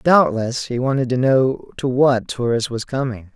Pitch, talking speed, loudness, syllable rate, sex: 125 Hz, 180 wpm, -19 LUFS, 4.4 syllables/s, male